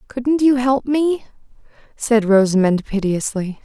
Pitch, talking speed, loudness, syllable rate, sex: 235 Hz, 115 wpm, -17 LUFS, 4.0 syllables/s, female